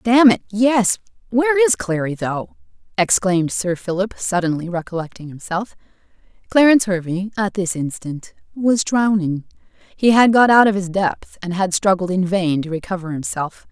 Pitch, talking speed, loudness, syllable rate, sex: 195 Hz, 145 wpm, -18 LUFS, 4.8 syllables/s, female